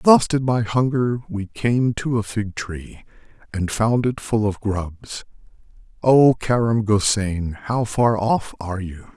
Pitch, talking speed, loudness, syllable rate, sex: 110 Hz, 150 wpm, -20 LUFS, 3.8 syllables/s, male